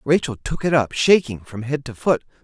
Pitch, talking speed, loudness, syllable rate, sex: 130 Hz, 220 wpm, -20 LUFS, 5.1 syllables/s, male